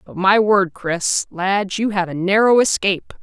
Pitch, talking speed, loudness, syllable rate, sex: 195 Hz, 185 wpm, -17 LUFS, 4.3 syllables/s, female